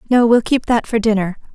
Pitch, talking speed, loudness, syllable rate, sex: 225 Hz, 195 wpm, -16 LUFS, 5.7 syllables/s, female